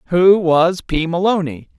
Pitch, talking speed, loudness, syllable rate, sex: 175 Hz, 135 wpm, -15 LUFS, 4.1 syllables/s, male